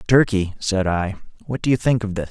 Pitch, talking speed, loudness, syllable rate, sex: 105 Hz, 235 wpm, -21 LUFS, 5.5 syllables/s, male